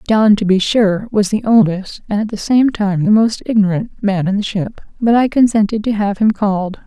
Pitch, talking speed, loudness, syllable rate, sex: 210 Hz, 225 wpm, -15 LUFS, 5.1 syllables/s, female